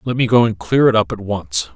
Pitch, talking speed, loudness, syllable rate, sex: 105 Hz, 310 wpm, -16 LUFS, 5.6 syllables/s, male